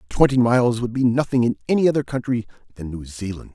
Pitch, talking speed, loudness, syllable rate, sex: 120 Hz, 205 wpm, -20 LUFS, 6.5 syllables/s, male